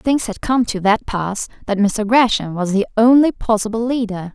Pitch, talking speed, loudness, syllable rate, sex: 220 Hz, 195 wpm, -17 LUFS, 4.7 syllables/s, female